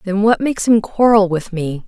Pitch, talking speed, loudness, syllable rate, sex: 200 Hz, 225 wpm, -15 LUFS, 5.1 syllables/s, female